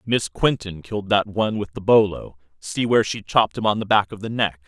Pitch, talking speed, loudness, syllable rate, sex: 105 Hz, 245 wpm, -21 LUFS, 5.8 syllables/s, male